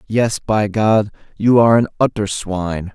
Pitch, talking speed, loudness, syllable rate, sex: 105 Hz, 165 wpm, -16 LUFS, 4.6 syllables/s, male